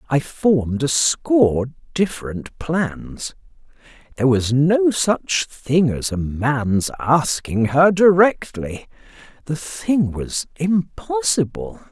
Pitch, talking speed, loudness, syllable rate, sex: 150 Hz, 100 wpm, -19 LUFS, 3.2 syllables/s, male